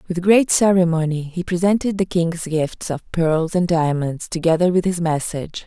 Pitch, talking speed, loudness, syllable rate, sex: 170 Hz, 170 wpm, -19 LUFS, 4.7 syllables/s, female